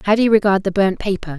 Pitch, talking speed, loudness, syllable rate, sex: 195 Hz, 305 wpm, -17 LUFS, 7.2 syllables/s, female